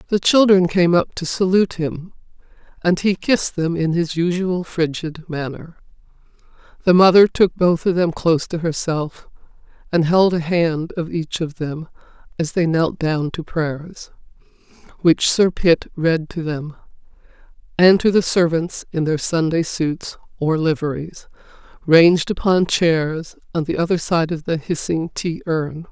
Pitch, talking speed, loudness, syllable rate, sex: 165 Hz, 155 wpm, -18 LUFS, 4.3 syllables/s, female